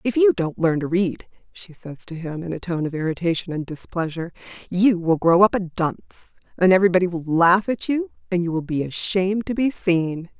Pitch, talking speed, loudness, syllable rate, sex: 180 Hz, 220 wpm, -21 LUFS, 5.7 syllables/s, female